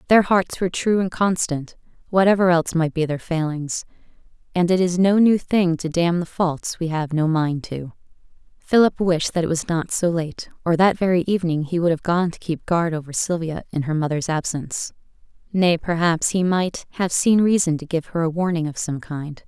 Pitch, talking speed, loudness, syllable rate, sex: 170 Hz, 205 wpm, -21 LUFS, 5.1 syllables/s, female